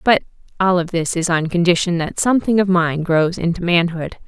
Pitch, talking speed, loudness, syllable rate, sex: 175 Hz, 195 wpm, -17 LUFS, 5.3 syllables/s, female